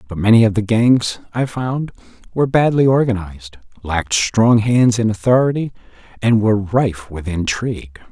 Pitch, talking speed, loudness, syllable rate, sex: 110 Hz, 150 wpm, -16 LUFS, 5.0 syllables/s, male